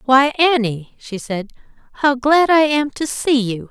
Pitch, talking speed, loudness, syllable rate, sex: 265 Hz, 180 wpm, -16 LUFS, 4.0 syllables/s, female